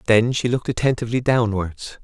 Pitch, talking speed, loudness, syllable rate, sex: 115 Hz, 145 wpm, -20 LUFS, 6.0 syllables/s, male